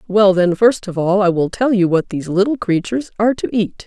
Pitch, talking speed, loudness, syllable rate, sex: 200 Hz, 250 wpm, -16 LUFS, 5.8 syllables/s, female